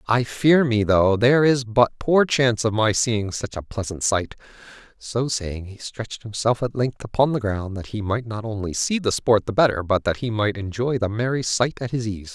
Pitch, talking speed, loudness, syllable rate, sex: 115 Hz, 230 wpm, -22 LUFS, 4.9 syllables/s, male